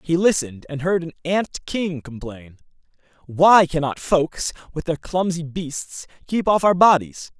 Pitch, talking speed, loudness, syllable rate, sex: 160 Hz, 155 wpm, -20 LUFS, 4.2 syllables/s, male